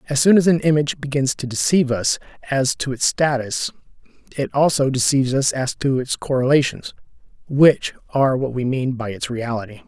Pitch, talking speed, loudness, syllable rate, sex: 135 Hz, 175 wpm, -19 LUFS, 5.5 syllables/s, male